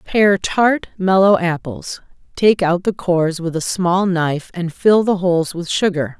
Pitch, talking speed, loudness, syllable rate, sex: 180 Hz, 165 wpm, -17 LUFS, 4.3 syllables/s, female